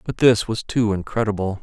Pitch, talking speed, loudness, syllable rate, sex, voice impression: 105 Hz, 185 wpm, -20 LUFS, 5.2 syllables/s, male, masculine, adult-like, slightly thick, cool, sincere, reassuring, slightly elegant